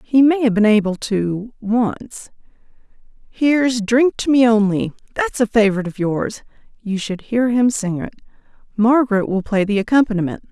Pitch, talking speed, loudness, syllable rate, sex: 220 Hz, 155 wpm, -17 LUFS, 4.8 syllables/s, female